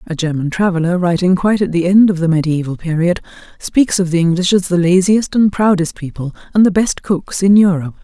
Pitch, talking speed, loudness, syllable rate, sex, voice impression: 180 Hz, 210 wpm, -14 LUFS, 5.7 syllables/s, female, feminine, adult-like, slightly soft, slightly cool